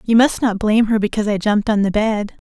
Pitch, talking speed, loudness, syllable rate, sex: 215 Hz, 265 wpm, -17 LUFS, 6.5 syllables/s, female